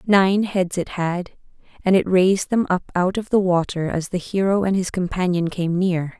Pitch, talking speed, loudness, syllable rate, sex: 185 Hz, 205 wpm, -20 LUFS, 4.7 syllables/s, female